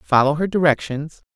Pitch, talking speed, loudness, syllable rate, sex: 155 Hz, 130 wpm, -19 LUFS, 5.0 syllables/s, female